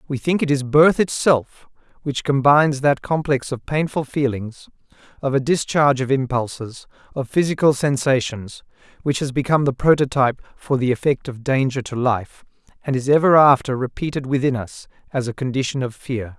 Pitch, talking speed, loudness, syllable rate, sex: 135 Hz, 165 wpm, -19 LUFS, 5.3 syllables/s, male